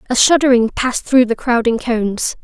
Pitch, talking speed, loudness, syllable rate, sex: 240 Hz, 175 wpm, -15 LUFS, 5.5 syllables/s, female